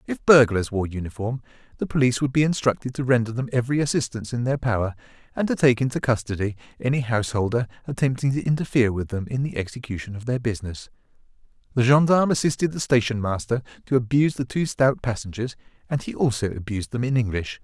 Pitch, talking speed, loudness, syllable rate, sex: 120 Hz, 185 wpm, -23 LUFS, 6.6 syllables/s, male